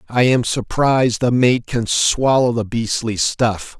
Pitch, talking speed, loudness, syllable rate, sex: 120 Hz, 160 wpm, -17 LUFS, 3.9 syllables/s, male